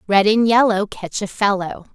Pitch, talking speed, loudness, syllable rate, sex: 205 Hz, 185 wpm, -17 LUFS, 4.6 syllables/s, female